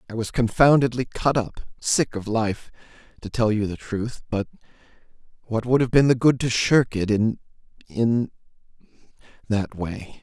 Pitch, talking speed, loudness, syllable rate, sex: 115 Hz, 135 wpm, -22 LUFS, 4.6 syllables/s, male